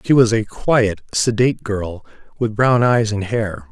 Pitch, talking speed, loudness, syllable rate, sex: 110 Hz, 180 wpm, -18 LUFS, 4.1 syllables/s, male